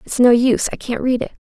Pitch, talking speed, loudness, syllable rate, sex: 245 Hz, 250 wpm, -17 LUFS, 6.5 syllables/s, female